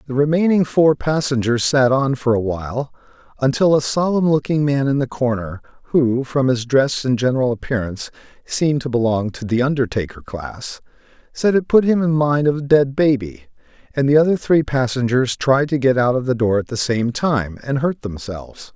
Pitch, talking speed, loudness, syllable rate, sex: 135 Hz, 190 wpm, -18 LUFS, 5.1 syllables/s, male